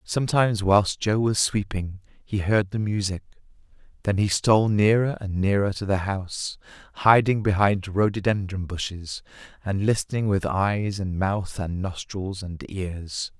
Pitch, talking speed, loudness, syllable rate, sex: 100 Hz, 145 wpm, -24 LUFS, 4.4 syllables/s, male